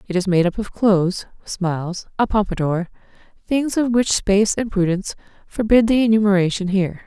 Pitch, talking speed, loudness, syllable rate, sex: 200 Hz, 160 wpm, -19 LUFS, 5.5 syllables/s, female